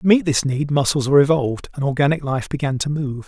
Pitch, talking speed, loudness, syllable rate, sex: 140 Hz, 240 wpm, -19 LUFS, 6.3 syllables/s, male